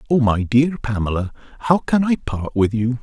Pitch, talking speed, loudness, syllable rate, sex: 125 Hz, 200 wpm, -19 LUFS, 4.9 syllables/s, male